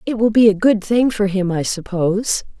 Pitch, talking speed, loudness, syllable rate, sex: 205 Hz, 230 wpm, -17 LUFS, 5.1 syllables/s, female